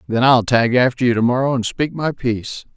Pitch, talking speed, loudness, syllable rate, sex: 125 Hz, 215 wpm, -17 LUFS, 5.5 syllables/s, male